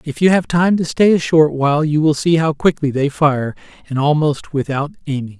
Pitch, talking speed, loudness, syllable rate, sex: 150 Hz, 220 wpm, -16 LUFS, 5.2 syllables/s, male